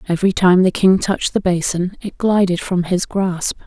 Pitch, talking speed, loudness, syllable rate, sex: 185 Hz, 195 wpm, -17 LUFS, 5.0 syllables/s, female